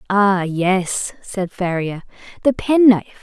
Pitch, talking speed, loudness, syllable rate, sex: 195 Hz, 110 wpm, -18 LUFS, 3.8 syllables/s, female